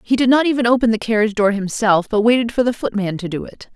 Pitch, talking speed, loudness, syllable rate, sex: 220 Hz, 270 wpm, -17 LUFS, 6.7 syllables/s, female